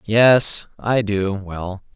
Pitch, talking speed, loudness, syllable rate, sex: 105 Hz, 90 wpm, -17 LUFS, 2.4 syllables/s, male